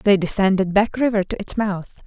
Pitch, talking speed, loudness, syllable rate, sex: 200 Hz, 205 wpm, -20 LUFS, 5.0 syllables/s, female